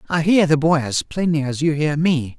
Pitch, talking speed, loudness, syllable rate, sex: 155 Hz, 250 wpm, -18 LUFS, 5.0 syllables/s, male